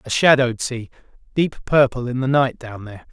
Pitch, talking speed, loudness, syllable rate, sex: 125 Hz, 190 wpm, -19 LUFS, 5.7 syllables/s, male